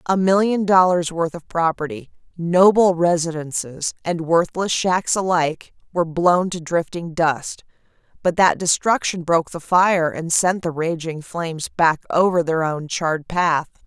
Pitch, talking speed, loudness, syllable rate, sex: 170 Hz, 145 wpm, -19 LUFS, 4.4 syllables/s, female